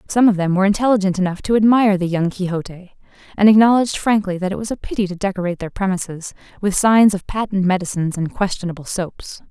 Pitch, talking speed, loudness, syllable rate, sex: 195 Hz, 195 wpm, -18 LUFS, 6.7 syllables/s, female